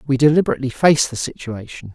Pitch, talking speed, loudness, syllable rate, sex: 130 Hz, 155 wpm, -17 LUFS, 7.3 syllables/s, male